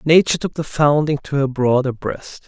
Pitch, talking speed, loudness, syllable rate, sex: 145 Hz, 195 wpm, -18 LUFS, 5.2 syllables/s, male